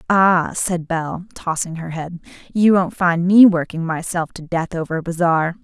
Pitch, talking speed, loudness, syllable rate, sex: 175 Hz, 180 wpm, -18 LUFS, 4.6 syllables/s, female